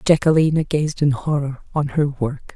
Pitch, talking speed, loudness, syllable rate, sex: 145 Hz, 165 wpm, -20 LUFS, 4.7 syllables/s, female